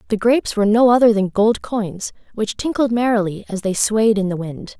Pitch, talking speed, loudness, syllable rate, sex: 215 Hz, 215 wpm, -17 LUFS, 5.4 syllables/s, female